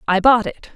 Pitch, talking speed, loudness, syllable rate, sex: 220 Hz, 240 wpm, -15 LUFS, 5.1 syllables/s, female